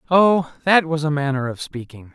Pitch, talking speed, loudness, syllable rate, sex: 150 Hz, 195 wpm, -19 LUFS, 5.0 syllables/s, male